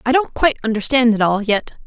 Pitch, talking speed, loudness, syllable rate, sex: 235 Hz, 225 wpm, -17 LUFS, 6.5 syllables/s, female